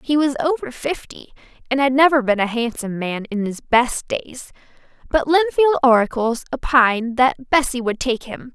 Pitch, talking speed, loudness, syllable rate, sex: 255 Hz, 170 wpm, -19 LUFS, 5.2 syllables/s, female